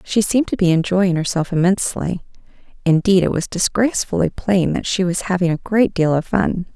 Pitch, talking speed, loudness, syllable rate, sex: 185 Hz, 185 wpm, -18 LUFS, 5.5 syllables/s, female